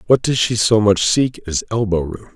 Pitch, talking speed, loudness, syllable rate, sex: 110 Hz, 205 wpm, -17 LUFS, 4.7 syllables/s, male